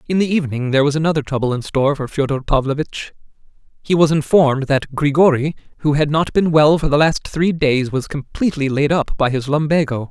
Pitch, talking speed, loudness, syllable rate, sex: 145 Hz, 200 wpm, -17 LUFS, 5.9 syllables/s, male